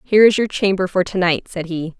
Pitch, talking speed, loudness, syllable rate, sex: 185 Hz, 270 wpm, -17 LUFS, 5.9 syllables/s, female